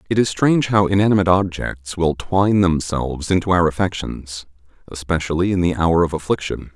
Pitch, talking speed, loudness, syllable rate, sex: 90 Hz, 160 wpm, -18 LUFS, 5.7 syllables/s, male